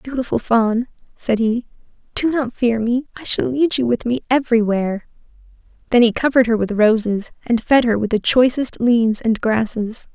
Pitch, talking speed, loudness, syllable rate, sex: 235 Hz, 175 wpm, -18 LUFS, 5.1 syllables/s, female